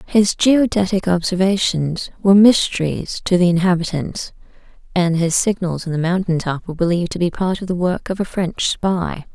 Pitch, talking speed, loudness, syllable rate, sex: 180 Hz, 175 wpm, -18 LUFS, 5.1 syllables/s, female